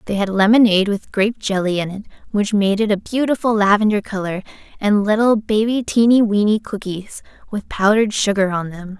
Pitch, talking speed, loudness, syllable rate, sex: 205 Hz, 175 wpm, -17 LUFS, 5.6 syllables/s, female